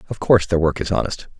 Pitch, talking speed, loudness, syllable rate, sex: 90 Hz, 260 wpm, -19 LUFS, 7.1 syllables/s, male